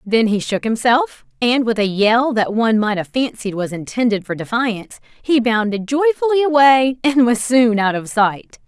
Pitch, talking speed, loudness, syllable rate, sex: 235 Hz, 185 wpm, -16 LUFS, 4.9 syllables/s, female